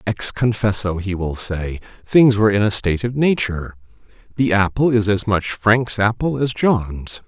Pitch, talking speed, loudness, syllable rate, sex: 105 Hz, 155 wpm, -18 LUFS, 4.6 syllables/s, male